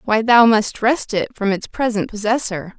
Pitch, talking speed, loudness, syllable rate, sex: 220 Hz, 195 wpm, -17 LUFS, 4.5 syllables/s, female